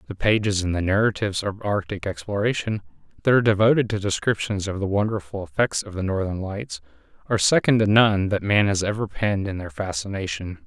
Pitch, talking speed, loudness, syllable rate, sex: 100 Hz, 185 wpm, -23 LUFS, 6.0 syllables/s, male